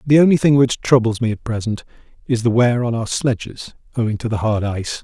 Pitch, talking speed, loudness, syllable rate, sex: 120 Hz, 225 wpm, -18 LUFS, 5.8 syllables/s, male